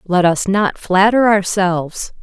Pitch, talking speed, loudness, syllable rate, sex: 190 Hz, 135 wpm, -15 LUFS, 3.9 syllables/s, female